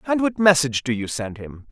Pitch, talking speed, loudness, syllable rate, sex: 145 Hz, 245 wpm, -20 LUFS, 5.8 syllables/s, male